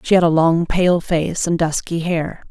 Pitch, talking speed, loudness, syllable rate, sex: 170 Hz, 215 wpm, -17 LUFS, 4.3 syllables/s, female